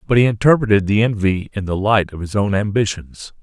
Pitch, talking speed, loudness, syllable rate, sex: 105 Hz, 210 wpm, -17 LUFS, 5.7 syllables/s, male